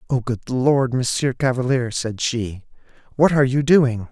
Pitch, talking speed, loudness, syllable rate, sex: 125 Hz, 160 wpm, -19 LUFS, 4.5 syllables/s, male